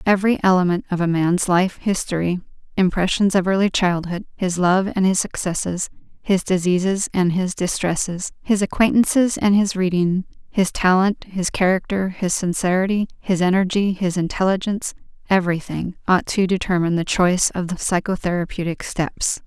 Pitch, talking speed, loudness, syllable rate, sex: 185 Hz, 135 wpm, -20 LUFS, 5.2 syllables/s, female